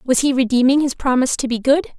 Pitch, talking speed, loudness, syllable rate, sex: 260 Hz, 240 wpm, -17 LUFS, 6.3 syllables/s, female